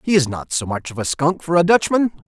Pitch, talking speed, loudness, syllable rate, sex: 160 Hz, 265 wpm, -19 LUFS, 5.1 syllables/s, male